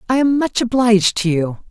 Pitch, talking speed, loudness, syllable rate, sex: 220 Hz, 210 wpm, -16 LUFS, 5.4 syllables/s, female